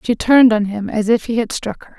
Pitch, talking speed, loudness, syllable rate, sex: 220 Hz, 305 wpm, -15 LUFS, 5.8 syllables/s, female